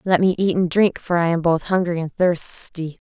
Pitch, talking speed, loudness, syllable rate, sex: 175 Hz, 235 wpm, -20 LUFS, 4.8 syllables/s, female